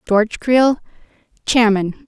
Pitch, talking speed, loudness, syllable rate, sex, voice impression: 225 Hz, 85 wpm, -16 LUFS, 4.1 syllables/s, female, feminine, adult-like, tensed, soft, clear, intellectual, calm, reassuring, slightly strict